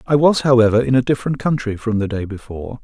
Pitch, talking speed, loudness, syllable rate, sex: 120 Hz, 235 wpm, -17 LUFS, 6.7 syllables/s, male